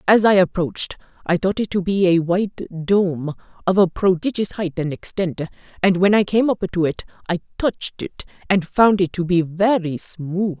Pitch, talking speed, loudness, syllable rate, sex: 185 Hz, 190 wpm, -19 LUFS, 4.8 syllables/s, female